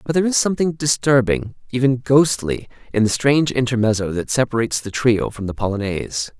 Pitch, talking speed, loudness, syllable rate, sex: 120 Hz, 170 wpm, -19 LUFS, 6.0 syllables/s, male